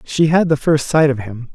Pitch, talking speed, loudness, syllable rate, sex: 145 Hz, 270 wpm, -15 LUFS, 4.9 syllables/s, male